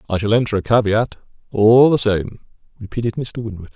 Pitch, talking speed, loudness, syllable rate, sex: 110 Hz, 175 wpm, -17 LUFS, 5.5 syllables/s, male